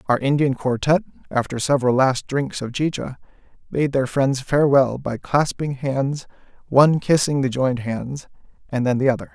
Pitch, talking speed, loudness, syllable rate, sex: 135 Hz, 160 wpm, -20 LUFS, 5.0 syllables/s, male